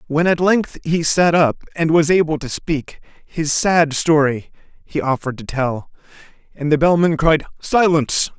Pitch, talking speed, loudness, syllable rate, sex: 155 Hz, 165 wpm, -17 LUFS, 4.5 syllables/s, male